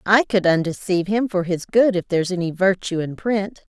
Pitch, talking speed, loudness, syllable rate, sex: 190 Hz, 210 wpm, -20 LUFS, 5.3 syllables/s, female